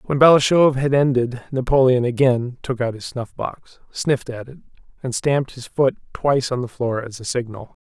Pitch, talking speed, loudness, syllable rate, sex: 125 Hz, 185 wpm, -20 LUFS, 5.2 syllables/s, male